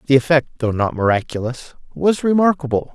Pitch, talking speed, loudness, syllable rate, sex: 140 Hz, 145 wpm, -18 LUFS, 5.8 syllables/s, male